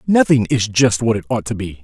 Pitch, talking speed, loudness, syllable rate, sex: 115 Hz, 260 wpm, -16 LUFS, 5.6 syllables/s, male